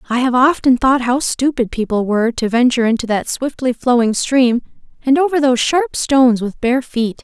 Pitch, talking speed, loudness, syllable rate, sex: 250 Hz, 190 wpm, -15 LUFS, 5.3 syllables/s, female